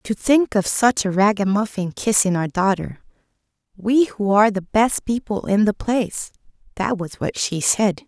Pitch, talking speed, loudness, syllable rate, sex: 205 Hz, 165 wpm, -19 LUFS, 4.6 syllables/s, female